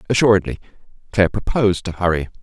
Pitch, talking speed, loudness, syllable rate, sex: 95 Hz, 125 wpm, -18 LUFS, 7.5 syllables/s, male